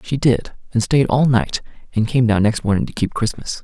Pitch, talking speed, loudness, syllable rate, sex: 120 Hz, 230 wpm, -18 LUFS, 5.3 syllables/s, male